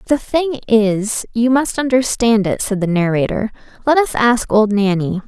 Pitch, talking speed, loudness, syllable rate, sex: 225 Hz, 170 wpm, -16 LUFS, 4.4 syllables/s, female